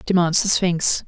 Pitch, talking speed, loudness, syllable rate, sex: 175 Hz, 165 wpm, -18 LUFS, 4.2 syllables/s, female